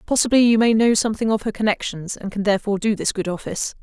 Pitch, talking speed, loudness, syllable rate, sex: 210 Hz, 235 wpm, -20 LUFS, 7.2 syllables/s, female